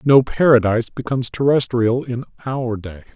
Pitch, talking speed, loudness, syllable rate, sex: 120 Hz, 135 wpm, -18 LUFS, 5.1 syllables/s, male